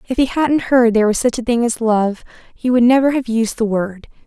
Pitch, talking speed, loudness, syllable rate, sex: 235 Hz, 255 wpm, -16 LUFS, 5.5 syllables/s, female